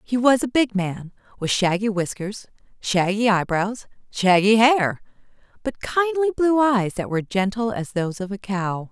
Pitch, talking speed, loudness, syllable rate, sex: 215 Hz, 155 wpm, -21 LUFS, 4.5 syllables/s, female